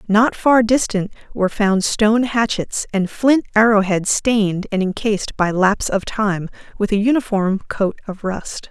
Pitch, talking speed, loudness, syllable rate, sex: 210 Hz, 165 wpm, -18 LUFS, 4.5 syllables/s, female